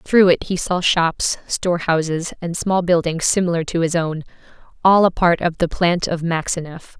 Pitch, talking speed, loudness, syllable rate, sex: 170 Hz, 190 wpm, -18 LUFS, 4.7 syllables/s, female